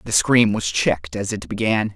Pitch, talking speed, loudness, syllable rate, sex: 100 Hz, 215 wpm, -20 LUFS, 5.0 syllables/s, male